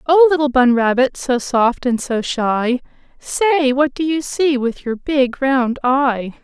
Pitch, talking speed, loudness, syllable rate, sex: 265 Hz, 175 wpm, -17 LUFS, 3.7 syllables/s, female